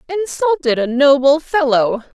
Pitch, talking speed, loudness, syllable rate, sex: 280 Hz, 110 wpm, -15 LUFS, 4.3 syllables/s, female